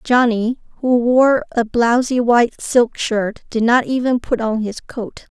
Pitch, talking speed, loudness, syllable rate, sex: 235 Hz, 170 wpm, -17 LUFS, 3.9 syllables/s, female